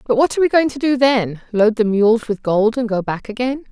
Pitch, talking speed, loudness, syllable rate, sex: 235 Hz, 260 wpm, -17 LUFS, 5.5 syllables/s, female